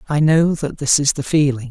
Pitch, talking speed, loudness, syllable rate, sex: 145 Hz, 245 wpm, -16 LUFS, 5.2 syllables/s, male